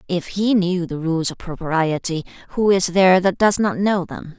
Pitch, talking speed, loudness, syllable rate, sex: 180 Hz, 205 wpm, -19 LUFS, 4.7 syllables/s, female